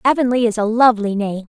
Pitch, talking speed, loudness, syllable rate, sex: 225 Hz, 195 wpm, -16 LUFS, 6.6 syllables/s, female